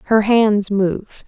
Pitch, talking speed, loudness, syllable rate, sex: 210 Hz, 140 wpm, -16 LUFS, 4.4 syllables/s, female